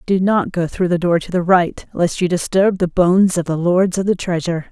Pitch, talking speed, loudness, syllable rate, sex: 180 Hz, 255 wpm, -17 LUFS, 5.3 syllables/s, female